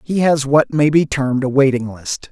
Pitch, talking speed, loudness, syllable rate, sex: 140 Hz, 235 wpm, -16 LUFS, 5.0 syllables/s, male